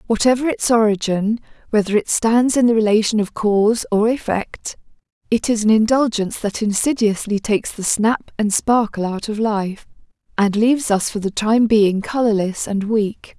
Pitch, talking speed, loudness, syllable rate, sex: 215 Hz, 165 wpm, -18 LUFS, 4.8 syllables/s, female